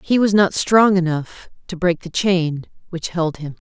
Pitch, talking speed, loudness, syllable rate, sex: 175 Hz, 195 wpm, -18 LUFS, 4.2 syllables/s, female